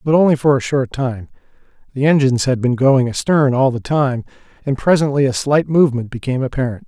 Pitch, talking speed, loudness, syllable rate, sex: 135 Hz, 190 wpm, -16 LUFS, 6.0 syllables/s, male